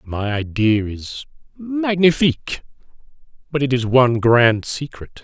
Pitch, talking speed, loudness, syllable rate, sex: 130 Hz, 115 wpm, -18 LUFS, 4.1 syllables/s, male